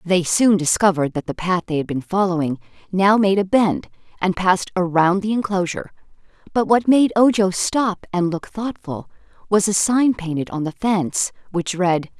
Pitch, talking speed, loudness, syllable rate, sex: 185 Hz, 175 wpm, -19 LUFS, 5.0 syllables/s, female